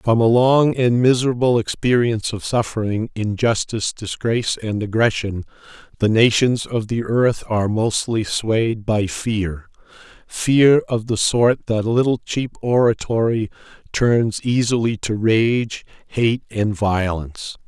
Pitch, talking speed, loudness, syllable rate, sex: 115 Hz, 125 wpm, -19 LUFS, 4.2 syllables/s, male